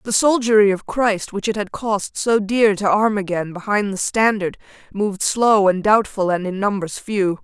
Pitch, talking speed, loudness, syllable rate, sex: 205 Hz, 195 wpm, -18 LUFS, 4.6 syllables/s, female